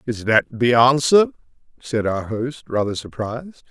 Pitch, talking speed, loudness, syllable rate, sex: 125 Hz, 145 wpm, -19 LUFS, 4.7 syllables/s, male